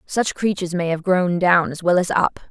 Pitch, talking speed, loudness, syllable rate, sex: 180 Hz, 240 wpm, -19 LUFS, 5.2 syllables/s, female